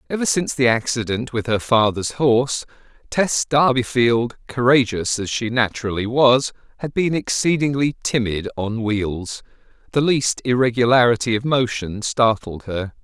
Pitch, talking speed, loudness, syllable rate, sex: 120 Hz, 130 wpm, -19 LUFS, 4.6 syllables/s, male